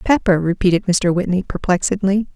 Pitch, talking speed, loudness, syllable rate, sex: 185 Hz, 125 wpm, -17 LUFS, 5.5 syllables/s, female